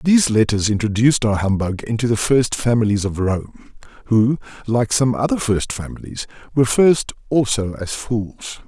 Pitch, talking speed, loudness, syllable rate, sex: 115 Hz, 150 wpm, -18 LUFS, 5.0 syllables/s, male